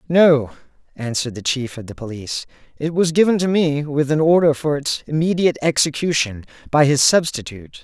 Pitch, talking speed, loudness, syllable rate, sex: 145 Hz, 170 wpm, -18 LUFS, 5.6 syllables/s, male